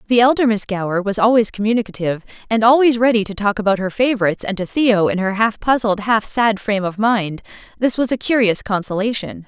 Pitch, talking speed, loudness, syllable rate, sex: 215 Hz, 205 wpm, -17 LUFS, 6.0 syllables/s, female